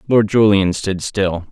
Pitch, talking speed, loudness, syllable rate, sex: 100 Hz, 160 wpm, -16 LUFS, 3.8 syllables/s, male